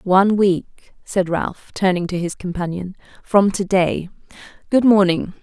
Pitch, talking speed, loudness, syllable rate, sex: 185 Hz, 135 wpm, -19 LUFS, 4.2 syllables/s, female